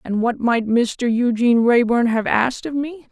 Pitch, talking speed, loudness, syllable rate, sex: 240 Hz, 195 wpm, -18 LUFS, 4.7 syllables/s, female